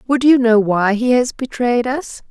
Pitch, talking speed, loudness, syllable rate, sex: 240 Hz, 210 wpm, -15 LUFS, 4.3 syllables/s, female